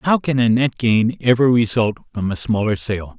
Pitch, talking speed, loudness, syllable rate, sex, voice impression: 115 Hz, 205 wpm, -18 LUFS, 4.8 syllables/s, male, masculine, middle-aged, tensed, powerful, slightly bright, clear, slightly calm, mature, friendly, unique, wild, slightly strict, slightly sharp